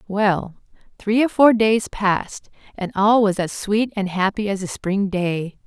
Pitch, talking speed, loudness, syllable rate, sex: 200 Hz, 180 wpm, -20 LUFS, 4.0 syllables/s, female